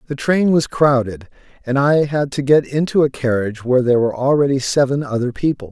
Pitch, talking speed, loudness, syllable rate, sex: 135 Hz, 200 wpm, -17 LUFS, 6.0 syllables/s, male